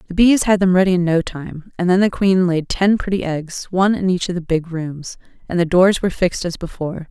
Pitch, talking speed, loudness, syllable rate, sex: 180 Hz, 255 wpm, -17 LUFS, 5.7 syllables/s, female